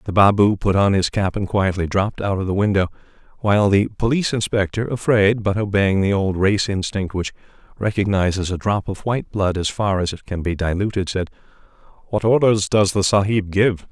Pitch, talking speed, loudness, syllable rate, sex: 100 Hz, 190 wpm, -19 LUFS, 5.4 syllables/s, male